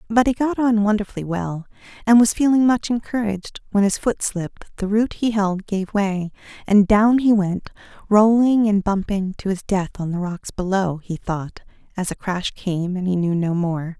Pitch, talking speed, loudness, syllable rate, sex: 200 Hz, 195 wpm, -20 LUFS, 4.8 syllables/s, female